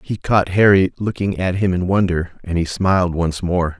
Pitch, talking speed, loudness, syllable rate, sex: 90 Hz, 205 wpm, -18 LUFS, 4.7 syllables/s, male